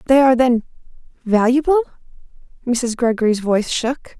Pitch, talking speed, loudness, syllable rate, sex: 245 Hz, 100 wpm, -17 LUFS, 5.3 syllables/s, female